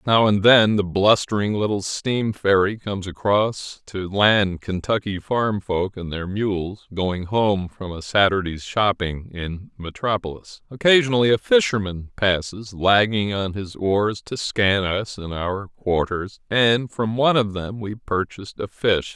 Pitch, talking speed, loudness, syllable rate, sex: 100 Hz, 155 wpm, -21 LUFS, 4.1 syllables/s, male